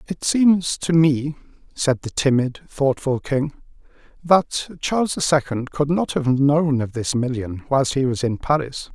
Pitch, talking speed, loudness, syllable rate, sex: 140 Hz, 170 wpm, -20 LUFS, 4.1 syllables/s, male